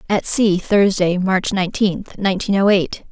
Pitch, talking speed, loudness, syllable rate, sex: 190 Hz, 155 wpm, -17 LUFS, 4.5 syllables/s, female